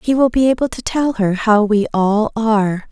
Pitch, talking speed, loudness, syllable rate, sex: 225 Hz, 225 wpm, -16 LUFS, 4.8 syllables/s, female